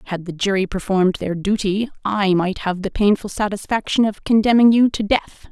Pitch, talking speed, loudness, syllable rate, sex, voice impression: 200 Hz, 185 wpm, -19 LUFS, 5.3 syllables/s, female, feminine, middle-aged, tensed, powerful, slightly hard, clear, fluent, intellectual, calm, elegant, lively, slightly strict, sharp